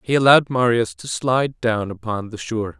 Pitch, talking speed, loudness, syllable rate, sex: 115 Hz, 195 wpm, -19 LUFS, 5.6 syllables/s, male